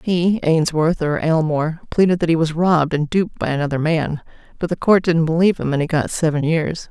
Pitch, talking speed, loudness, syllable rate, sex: 160 Hz, 210 wpm, -18 LUFS, 5.7 syllables/s, female